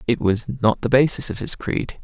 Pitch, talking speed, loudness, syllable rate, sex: 120 Hz, 235 wpm, -20 LUFS, 5.2 syllables/s, male